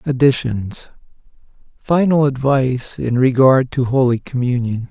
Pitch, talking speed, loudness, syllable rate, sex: 130 Hz, 100 wpm, -16 LUFS, 4.3 syllables/s, male